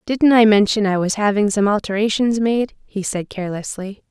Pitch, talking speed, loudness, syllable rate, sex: 210 Hz, 175 wpm, -18 LUFS, 5.2 syllables/s, female